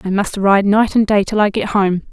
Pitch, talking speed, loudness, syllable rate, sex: 200 Hz, 285 wpm, -15 LUFS, 5.0 syllables/s, female